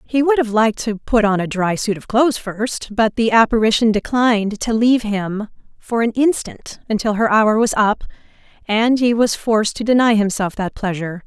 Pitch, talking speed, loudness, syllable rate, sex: 220 Hz, 195 wpm, -17 LUFS, 5.1 syllables/s, female